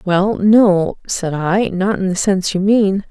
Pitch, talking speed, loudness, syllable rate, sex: 195 Hz, 195 wpm, -15 LUFS, 3.8 syllables/s, female